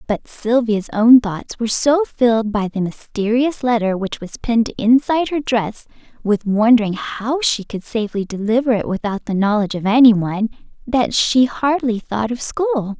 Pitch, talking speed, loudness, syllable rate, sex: 230 Hz, 165 wpm, -17 LUFS, 4.8 syllables/s, female